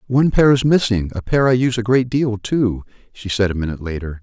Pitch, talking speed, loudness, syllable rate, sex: 110 Hz, 225 wpm, -17 LUFS, 6.1 syllables/s, male